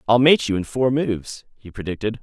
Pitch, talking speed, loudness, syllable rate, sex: 115 Hz, 215 wpm, -20 LUFS, 5.6 syllables/s, male